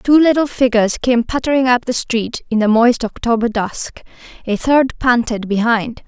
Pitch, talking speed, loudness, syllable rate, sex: 240 Hz, 170 wpm, -15 LUFS, 4.7 syllables/s, female